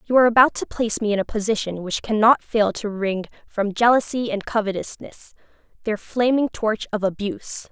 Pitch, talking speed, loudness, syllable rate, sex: 215 Hz, 180 wpm, -21 LUFS, 5.4 syllables/s, female